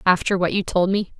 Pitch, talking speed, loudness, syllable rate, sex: 185 Hz, 250 wpm, -20 LUFS, 5.8 syllables/s, female